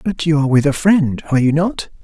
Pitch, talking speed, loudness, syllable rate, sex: 155 Hz, 265 wpm, -15 LUFS, 6.2 syllables/s, male